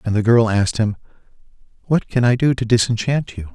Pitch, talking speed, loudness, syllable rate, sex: 115 Hz, 205 wpm, -18 LUFS, 5.9 syllables/s, male